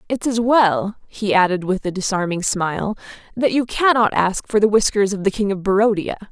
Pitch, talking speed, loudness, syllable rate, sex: 205 Hz, 200 wpm, -18 LUFS, 5.3 syllables/s, female